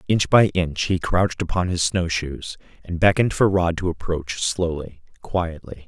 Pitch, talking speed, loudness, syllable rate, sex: 85 Hz, 175 wpm, -21 LUFS, 4.6 syllables/s, male